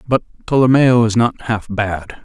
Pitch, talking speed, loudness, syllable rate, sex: 115 Hz, 160 wpm, -15 LUFS, 4.3 syllables/s, male